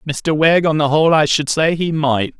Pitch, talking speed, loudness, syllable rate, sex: 155 Hz, 250 wpm, -15 LUFS, 5.1 syllables/s, male